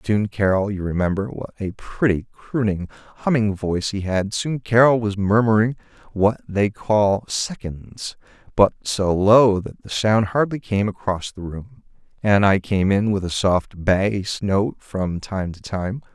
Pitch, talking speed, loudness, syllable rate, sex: 105 Hz, 155 wpm, -21 LUFS, 4.1 syllables/s, male